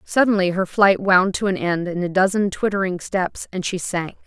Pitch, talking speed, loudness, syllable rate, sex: 185 Hz, 210 wpm, -20 LUFS, 4.9 syllables/s, female